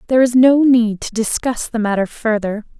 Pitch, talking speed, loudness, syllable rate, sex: 230 Hz, 195 wpm, -16 LUFS, 5.3 syllables/s, female